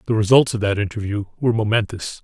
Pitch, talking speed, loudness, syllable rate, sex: 105 Hz, 190 wpm, -19 LUFS, 6.5 syllables/s, male